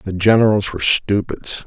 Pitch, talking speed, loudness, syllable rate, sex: 100 Hz, 145 wpm, -16 LUFS, 5.2 syllables/s, male